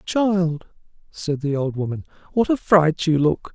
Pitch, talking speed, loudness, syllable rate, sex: 165 Hz, 170 wpm, -21 LUFS, 4.0 syllables/s, male